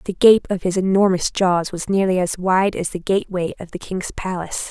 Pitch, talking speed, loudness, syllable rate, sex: 185 Hz, 215 wpm, -19 LUFS, 5.4 syllables/s, female